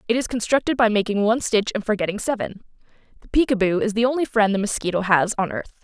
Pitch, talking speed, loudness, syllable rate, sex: 215 Hz, 215 wpm, -21 LUFS, 6.8 syllables/s, female